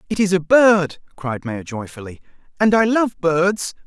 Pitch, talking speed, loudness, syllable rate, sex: 175 Hz, 170 wpm, -18 LUFS, 4.3 syllables/s, male